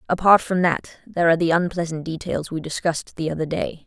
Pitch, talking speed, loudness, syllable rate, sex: 170 Hz, 200 wpm, -21 LUFS, 6.1 syllables/s, female